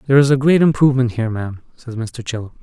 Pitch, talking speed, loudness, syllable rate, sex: 125 Hz, 230 wpm, -17 LUFS, 7.5 syllables/s, male